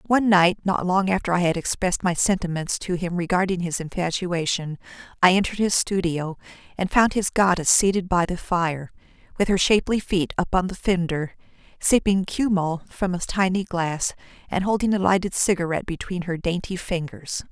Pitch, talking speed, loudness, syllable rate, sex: 180 Hz, 170 wpm, -22 LUFS, 5.4 syllables/s, female